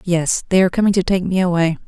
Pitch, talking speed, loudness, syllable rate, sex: 180 Hz, 255 wpm, -17 LUFS, 6.7 syllables/s, female